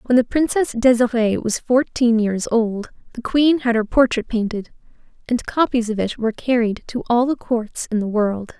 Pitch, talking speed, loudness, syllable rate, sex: 235 Hz, 190 wpm, -19 LUFS, 4.8 syllables/s, female